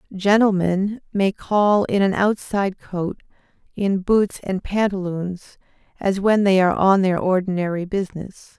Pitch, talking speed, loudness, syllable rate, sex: 195 Hz, 135 wpm, -20 LUFS, 4.4 syllables/s, female